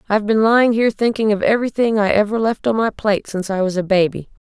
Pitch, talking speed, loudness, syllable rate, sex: 210 Hz, 240 wpm, -17 LUFS, 7.0 syllables/s, female